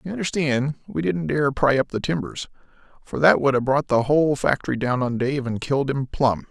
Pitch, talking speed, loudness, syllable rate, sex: 140 Hz, 220 wpm, -22 LUFS, 5.4 syllables/s, male